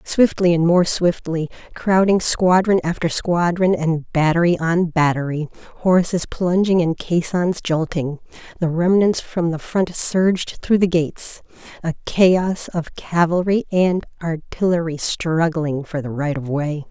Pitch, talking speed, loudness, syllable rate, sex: 170 Hz, 135 wpm, -19 LUFS, 4.1 syllables/s, female